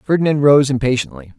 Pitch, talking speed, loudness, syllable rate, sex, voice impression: 140 Hz, 130 wpm, -15 LUFS, 5.3 syllables/s, male, masculine, adult-like, slightly powerful, slightly hard, raspy, cool, calm, slightly mature, wild, slightly lively, slightly strict